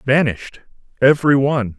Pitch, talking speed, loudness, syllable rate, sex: 130 Hz, 100 wpm, -16 LUFS, 6.0 syllables/s, male